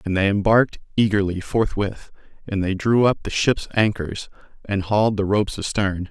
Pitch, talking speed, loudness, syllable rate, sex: 100 Hz, 165 wpm, -21 LUFS, 5.1 syllables/s, male